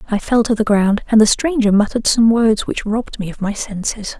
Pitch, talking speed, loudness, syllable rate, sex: 220 Hz, 245 wpm, -16 LUFS, 5.6 syllables/s, female